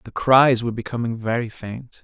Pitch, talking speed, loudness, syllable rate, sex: 120 Hz, 175 wpm, -20 LUFS, 5.2 syllables/s, male